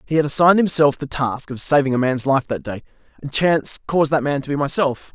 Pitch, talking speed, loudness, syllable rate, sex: 140 Hz, 235 wpm, -18 LUFS, 6.1 syllables/s, male